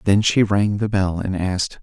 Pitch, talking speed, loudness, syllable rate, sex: 100 Hz, 230 wpm, -19 LUFS, 4.8 syllables/s, male